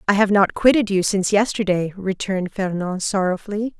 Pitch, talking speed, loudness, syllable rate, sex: 195 Hz, 160 wpm, -20 LUFS, 5.6 syllables/s, female